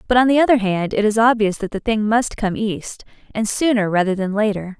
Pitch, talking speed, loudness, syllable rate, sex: 215 Hz, 240 wpm, -18 LUFS, 5.5 syllables/s, female